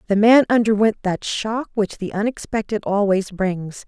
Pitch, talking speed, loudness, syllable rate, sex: 210 Hz, 155 wpm, -19 LUFS, 4.6 syllables/s, female